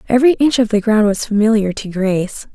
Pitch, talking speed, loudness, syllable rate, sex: 220 Hz, 210 wpm, -15 LUFS, 6.0 syllables/s, female